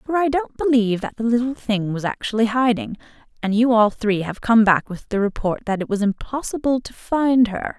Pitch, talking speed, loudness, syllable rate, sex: 230 Hz, 215 wpm, -20 LUFS, 5.3 syllables/s, female